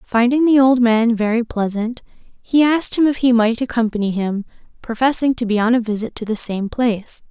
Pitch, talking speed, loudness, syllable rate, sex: 235 Hz, 195 wpm, -17 LUFS, 5.2 syllables/s, female